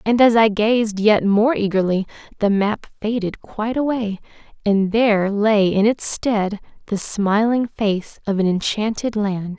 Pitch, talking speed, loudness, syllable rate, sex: 210 Hz, 155 wpm, -19 LUFS, 4.1 syllables/s, female